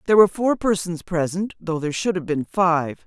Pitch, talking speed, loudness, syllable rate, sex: 175 Hz, 215 wpm, -21 LUFS, 5.5 syllables/s, female